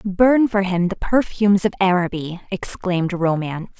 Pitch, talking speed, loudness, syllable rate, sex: 190 Hz, 140 wpm, -19 LUFS, 4.9 syllables/s, female